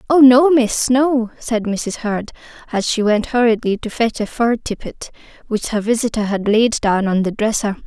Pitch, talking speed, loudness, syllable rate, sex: 225 Hz, 190 wpm, -17 LUFS, 4.6 syllables/s, female